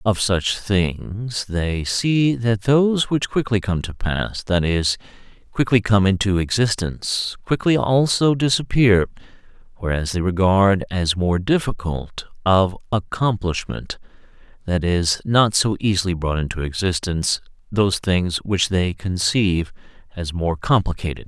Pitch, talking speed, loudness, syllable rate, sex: 100 Hz, 115 wpm, -20 LUFS, 4.2 syllables/s, male